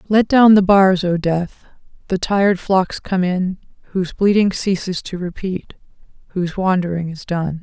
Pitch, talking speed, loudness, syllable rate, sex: 185 Hz, 155 wpm, -17 LUFS, 4.6 syllables/s, female